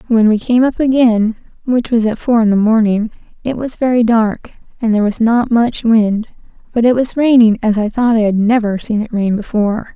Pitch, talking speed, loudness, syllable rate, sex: 225 Hz, 215 wpm, -14 LUFS, 5.2 syllables/s, female